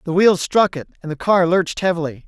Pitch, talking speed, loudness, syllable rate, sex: 175 Hz, 235 wpm, -17 LUFS, 6.0 syllables/s, male